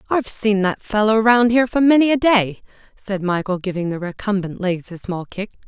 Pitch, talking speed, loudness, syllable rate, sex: 210 Hz, 200 wpm, -18 LUFS, 5.5 syllables/s, female